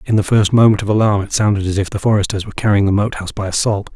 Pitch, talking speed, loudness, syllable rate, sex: 105 Hz, 290 wpm, -15 LUFS, 7.3 syllables/s, male